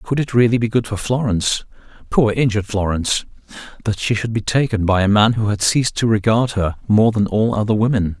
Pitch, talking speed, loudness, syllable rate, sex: 110 Hz, 205 wpm, -17 LUFS, 5.8 syllables/s, male